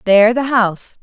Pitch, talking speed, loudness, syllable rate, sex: 220 Hz, 175 wpm, -14 LUFS, 6.0 syllables/s, female